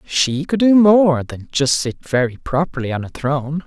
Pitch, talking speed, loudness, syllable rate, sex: 150 Hz, 195 wpm, -17 LUFS, 4.6 syllables/s, male